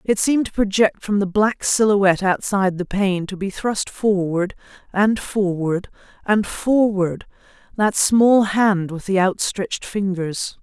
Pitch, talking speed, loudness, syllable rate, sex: 200 Hz, 135 wpm, -19 LUFS, 4.1 syllables/s, female